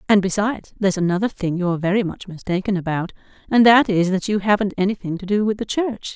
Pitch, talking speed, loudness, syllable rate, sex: 195 Hz, 215 wpm, -20 LUFS, 6.3 syllables/s, female